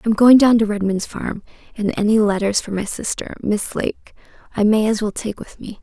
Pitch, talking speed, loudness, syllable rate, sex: 215 Hz, 215 wpm, -18 LUFS, 5.1 syllables/s, female